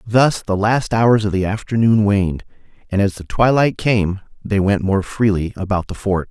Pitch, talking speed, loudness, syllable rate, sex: 105 Hz, 190 wpm, -17 LUFS, 4.8 syllables/s, male